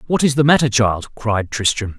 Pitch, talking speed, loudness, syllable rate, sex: 120 Hz, 210 wpm, -17 LUFS, 4.9 syllables/s, male